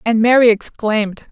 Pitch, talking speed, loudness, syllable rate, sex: 225 Hz, 135 wpm, -14 LUFS, 5.0 syllables/s, female